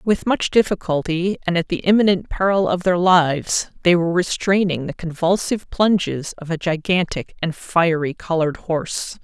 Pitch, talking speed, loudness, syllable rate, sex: 175 Hz, 155 wpm, -19 LUFS, 5.0 syllables/s, female